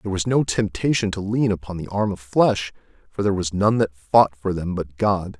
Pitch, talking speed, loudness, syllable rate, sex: 100 Hz, 235 wpm, -21 LUFS, 5.2 syllables/s, male